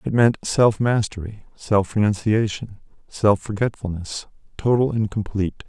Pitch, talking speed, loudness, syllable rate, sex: 105 Hz, 115 wpm, -21 LUFS, 4.5 syllables/s, male